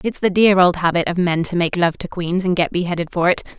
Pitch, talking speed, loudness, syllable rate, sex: 175 Hz, 285 wpm, -18 LUFS, 6.1 syllables/s, female